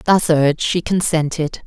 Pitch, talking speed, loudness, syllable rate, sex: 160 Hz, 145 wpm, -17 LUFS, 4.3 syllables/s, female